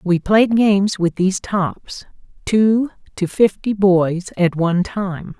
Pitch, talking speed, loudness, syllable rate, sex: 195 Hz, 135 wpm, -17 LUFS, 3.6 syllables/s, female